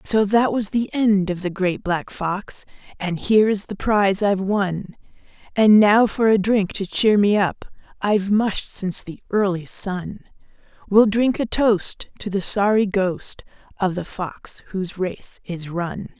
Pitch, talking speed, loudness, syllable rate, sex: 200 Hz, 170 wpm, -20 LUFS, 4.1 syllables/s, female